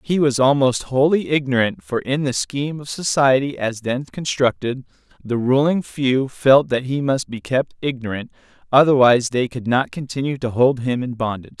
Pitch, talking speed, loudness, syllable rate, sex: 130 Hz, 175 wpm, -19 LUFS, 5.0 syllables/s, male